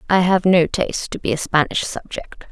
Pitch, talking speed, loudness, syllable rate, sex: 170 Hz, 215 wpm, -19 LUFS, 5.2 syllables/s, female